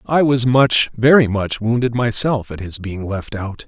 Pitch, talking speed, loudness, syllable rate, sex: 115 Hz, 195 wpm, -17 LUFS, 4.3 syllables/s, male